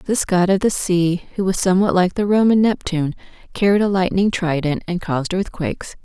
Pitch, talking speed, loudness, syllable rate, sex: 185 Hz, 190 wpm, -18 LUFS, 5.6 syllables/s, female